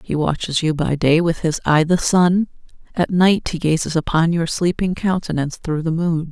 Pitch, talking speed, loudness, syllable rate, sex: 165 Hz, 200 wpm, -18 LUFS, 4.9 syllables/s, female